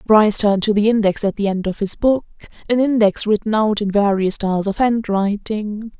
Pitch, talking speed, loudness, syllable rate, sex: 210 Hz, 190 wpm, -18 LUFS, 5.3 syllables/s, female